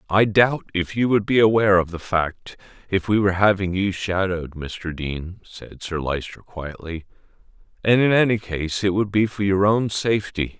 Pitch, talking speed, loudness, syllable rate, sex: 95 Hz, 185 wpm, -21 LUFS, 4.9 syllables/s, male